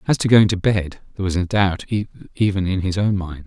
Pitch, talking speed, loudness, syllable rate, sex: 95 Hz, 240 wpm, -19 LUFS, 5.1 syllables/s, male